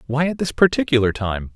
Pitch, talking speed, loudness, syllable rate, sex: 140 Hz, 195 wpm, -19 LUFS, 5.8 syllables/s, male